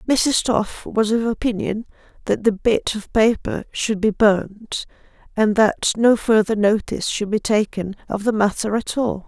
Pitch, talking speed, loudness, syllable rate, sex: 215 Hz, 170 wpm, -20 LUFS, 4.4 syllables/s, female